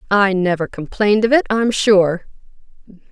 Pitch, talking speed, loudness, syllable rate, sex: 200 Hz, 135 wpm, -16 LUFS, 4.9 syllables/s, female